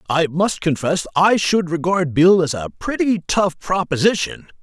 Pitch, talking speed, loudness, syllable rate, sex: 170 Hz, 155 wpm, -18 LUFS, 4.4 syllables/s, male